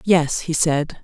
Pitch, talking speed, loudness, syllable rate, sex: 160 Hz, 175 wpm, -19 LUFS, 3.2 syllables/s, female